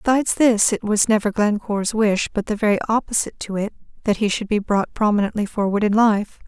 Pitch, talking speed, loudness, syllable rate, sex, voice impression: 210 Hz, 205 wpm, -20 LUFS, 6.0 syllables/s, female, feminine, adult-like, tensed, soft, clear, slightly intellectual, calm, friendly, reassuring, slightly sweet, kind, slightly modest